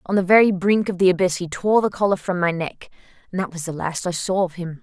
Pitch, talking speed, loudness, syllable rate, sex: 180 Hz, 260 wpm, -20 LUFS, 5.8 syllables/s, female